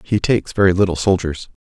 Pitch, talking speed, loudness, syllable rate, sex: 95 Hz, 185 wpm, -17 LUFS, 6.3 syllables/s, male